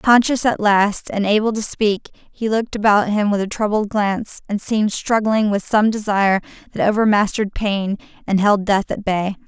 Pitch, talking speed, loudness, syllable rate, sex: 210 Hz, 185 wpm, -18 LUFS, 5.0 syllables/s, female